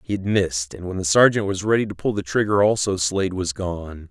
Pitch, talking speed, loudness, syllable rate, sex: 95 Hz, 250 wpm, -21 LUFS, 5.7 syllables/s, male